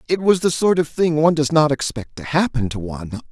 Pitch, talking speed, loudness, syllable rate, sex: 145 Hz, 255 wpm, -19 LUFS, 5.9 syllables/s, male